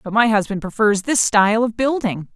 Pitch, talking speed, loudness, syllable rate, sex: 215 Hz, 205 wpm, -18 LUFS, 5.4 syllables/s, female